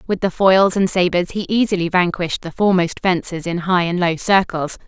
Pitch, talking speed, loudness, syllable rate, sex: 180 Hz, 195 wpm, -17 LUFS, 5.4 syllables/s, female